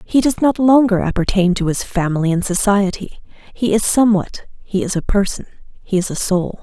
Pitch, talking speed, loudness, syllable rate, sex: 200 Hz, 190 wpm, -16 LUFS, 5.3 syllables/s, female